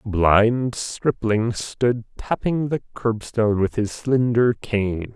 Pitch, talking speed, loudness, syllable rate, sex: 115 Hz, 130 wpm, -21 LUFS, 3.4 syllables/s, male